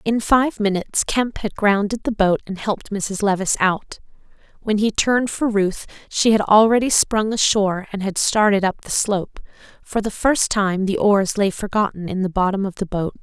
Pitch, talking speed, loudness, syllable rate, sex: 205 Hz, 195 wpm, -19 LUFS, 5.1 syllables/s, female